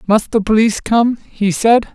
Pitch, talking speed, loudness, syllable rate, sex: 215 Hz, 185 wpm, -14 LUFS, 4.7 syllables/s, male